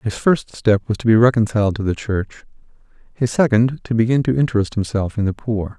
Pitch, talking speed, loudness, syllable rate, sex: 110 Hz, 210 wpm, -18 LUFS, 5.5 syllables/s, male